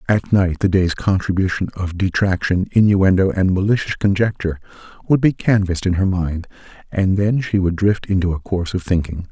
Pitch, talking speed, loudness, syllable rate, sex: 95 Hz, 175 wpm, -18 LUFS, 5.5 syllables/s, male